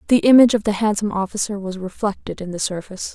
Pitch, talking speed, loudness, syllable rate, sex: 205 Hz, 210 wpm, -19 LUFS, 7.1 syllables/s, female